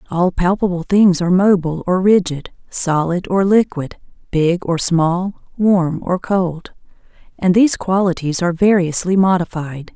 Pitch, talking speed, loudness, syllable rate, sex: 180 Hz, 135 wpm, -16 LUFS, 4.5 syllables/s, female